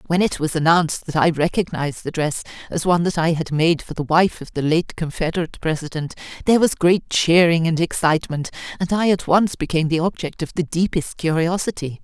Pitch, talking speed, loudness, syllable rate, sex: 165 Hz, 200 wpm, -20 LUFS, 5.9 syllables/s, female